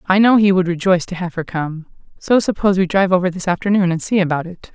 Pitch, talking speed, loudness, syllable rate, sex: 185 Hz, 255 wpm, -17 LUFS, 6.6 syllables/s, female